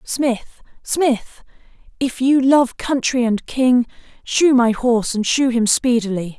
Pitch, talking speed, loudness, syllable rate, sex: 245 Hz, 140 wpm, -17 LUFS, 3.8 syllables/s, female